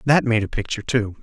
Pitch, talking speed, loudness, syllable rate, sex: 115 Hz, 245 wpm, -21 LUFS, 6.3 syllables/s, male